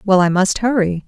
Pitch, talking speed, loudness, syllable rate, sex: 195 Hz, 225 wpm, -16 LUFS, 5.2 syllables/s, female